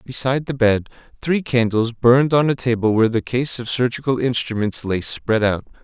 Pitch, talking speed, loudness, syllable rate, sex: 120 Hz, 185 wpm, -19 LUFS, 5.4 syllables/s, male